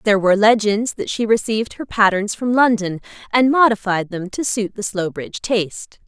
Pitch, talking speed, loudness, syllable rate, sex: 210 Hz, 180 wpm, -18 LUFS, 5.4 syllables/s, female